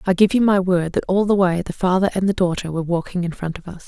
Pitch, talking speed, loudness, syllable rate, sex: 185 Hz, 310 wpm, -19 LUFS, 6.7 syllables/s, female